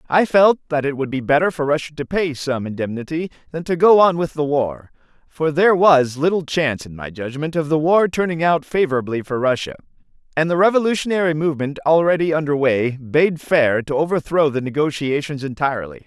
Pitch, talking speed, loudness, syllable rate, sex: 150 Hz, 185 wpm, -18 LUFS, 5.6 syllables/s, male